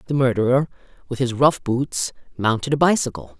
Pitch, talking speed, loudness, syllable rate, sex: 135 Hz, 160 wpm, -20 LUFS, 5.4 syllables/s, female